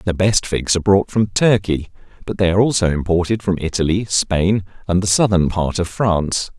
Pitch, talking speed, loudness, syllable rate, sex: 95 Hz, 190 wpm, -17 LUFS, 5.2 syllables/s, male